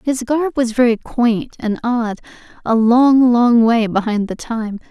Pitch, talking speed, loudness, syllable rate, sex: 235 Hz, 160 wpm, -16 LUFS, 3.9 syllables/s, female